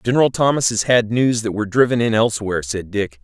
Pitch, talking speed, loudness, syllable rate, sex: 115 Hz, 225 wpm, -18 LUFS, 6.4 syllables/s, male